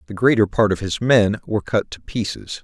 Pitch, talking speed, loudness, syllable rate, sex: 105 Hz, 230 wpm, -19 LUFS, 5.5 syllables/s, male